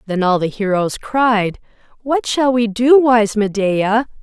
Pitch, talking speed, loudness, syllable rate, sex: 225 Hz, 155 wpm, -16 LUFS, 3.7 syllables/s, female